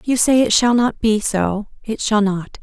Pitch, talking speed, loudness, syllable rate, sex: 220 Hz, 250 wpm, -17 LUFS, 4.5 syllables/s, female